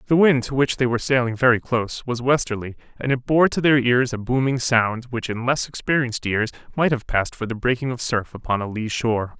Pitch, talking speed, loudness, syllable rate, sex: 125 Hz, 235 wpm, -21 LUFS, 5.9 syllables/s, male